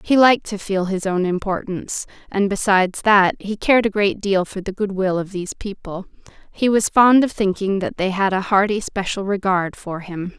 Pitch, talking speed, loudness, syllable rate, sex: 195 Hz, 210 wpm, -19 LUFS, 5.1 syllables/s, female